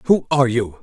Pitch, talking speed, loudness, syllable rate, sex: 130 Hz, 215 wpm, -17 LUFS, 5.3 syllables/s, male